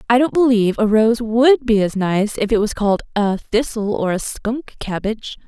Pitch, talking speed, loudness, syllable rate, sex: 220 Hz, 210 wpm, -17 LUFS, 5.0 syllables/s, female